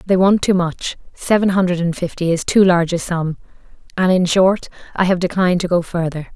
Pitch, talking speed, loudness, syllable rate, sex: 180 Hz, 190 wpm, -17 LUFS, 5.6 syllables/s, female